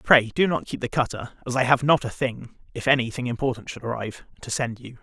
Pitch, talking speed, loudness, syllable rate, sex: 125 Hz, 250 wpm, -24 LUFS, 6.1 syllables/s, male